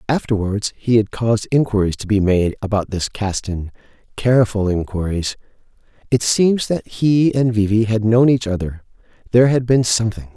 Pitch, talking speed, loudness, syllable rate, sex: 110 Hz, 160 wpm, -18 LUFS, 5.1 syllables/s, male